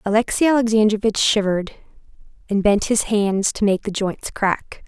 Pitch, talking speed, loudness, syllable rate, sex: 210 Hz, 150 wpm, -19 LUFS, 4.9 syllables/s, female